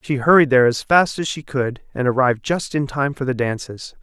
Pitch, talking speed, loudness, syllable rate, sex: 135 Hz, 240 wpm, -18 LUFS, 5.5 syllables/s, male